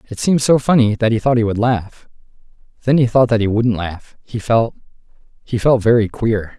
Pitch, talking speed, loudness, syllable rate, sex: 115 Hz, 190 wpm, -16 LUFS, 5.1 syllables/s, male